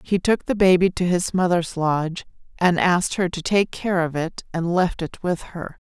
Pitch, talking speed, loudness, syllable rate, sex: 175 Hz, 215 wpm, -21 LUFS, 4.7 syllables/s, female